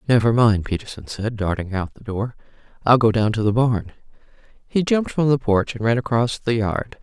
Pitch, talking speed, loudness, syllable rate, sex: 115 Hz, 205 wpm, -20 LUFS, 5.3 syllables/s, female